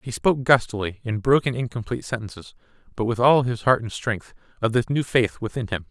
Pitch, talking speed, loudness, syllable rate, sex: 120 Hz, 205 wpm, -23 LUFS, 5.9 syllables/s, male